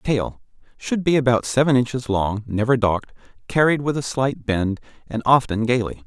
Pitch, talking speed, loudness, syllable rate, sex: 120 Hz, 160 wpm, -21 LUFS, 5.0 syllables/s, male